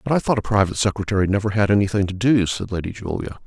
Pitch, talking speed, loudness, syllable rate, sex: 105 Hz, 240 wpm, -20 LUFS, 7.1 syllables/s, male